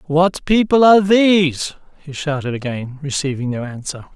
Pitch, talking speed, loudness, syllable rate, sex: 155 Hz, 145 wpm, -16 LUFS, 4.9 syllables/s, male